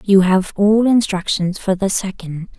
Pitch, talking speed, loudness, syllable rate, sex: 195 Hz, 165 wpm, -16 LUFS, 4.2 syllables/s, female